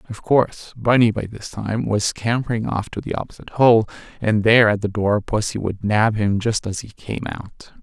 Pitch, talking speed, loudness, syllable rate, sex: 110 Hz, 205 wpm, -20 LUFS, 5.1 syllables/s, male